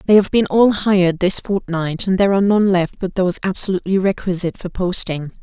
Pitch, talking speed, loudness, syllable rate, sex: 190 Hz, 200 wpm, -17 LUFS, 6.0 syllables/s, female